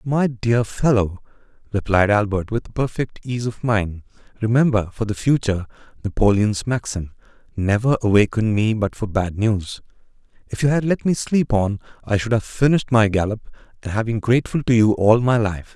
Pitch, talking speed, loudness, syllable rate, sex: 110 Hz, 170 wpm, -20 LUFS, 5.1 syllables/s, male